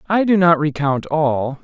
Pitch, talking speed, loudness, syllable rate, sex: 160 Hz, 185 wpm, -17 LUFS, 4.0 syllables/s, male